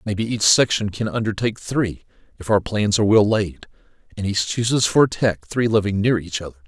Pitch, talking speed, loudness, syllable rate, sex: 105 Hz, 200 wpm, -20 LUFS, 5.7 syllables/s, male